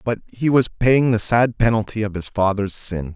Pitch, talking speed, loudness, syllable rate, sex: 110 Hz, 210 wpm, -19 LUFS, 4.8 syllables/s, male